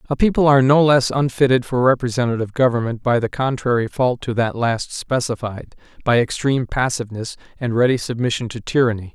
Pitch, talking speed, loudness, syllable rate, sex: 125 Hz, 155 wpm, -19 LUFS, 5.9 syllables/s, male